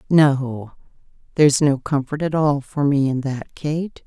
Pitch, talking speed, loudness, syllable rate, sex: 145 Hz, 160 wpm, -20 LUFS, 4.1 syllables/s, female